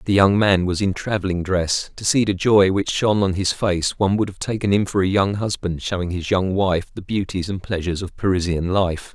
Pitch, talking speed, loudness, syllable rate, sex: 95 Hz, 235 wpm, -20 LUFS, 5.4 syllables/s, male